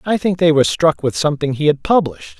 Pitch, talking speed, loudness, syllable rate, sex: 165 Hz, 250 wpm, -16 LUFS, 6.6 syllables/s, female